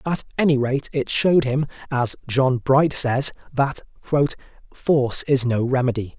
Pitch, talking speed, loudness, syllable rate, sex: 135 Hz, 145 wpm, -20 LUFS, 4.7 syllables/s, male